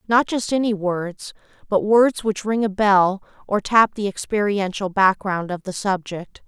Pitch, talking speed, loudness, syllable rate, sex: 200 Hz, 165 wpm, -20 LUFS, 4.2 syllables/s, female